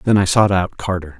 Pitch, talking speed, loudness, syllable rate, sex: 95 Hz, 250 wpm, -17 LUFS, 5.2 syllables/s, male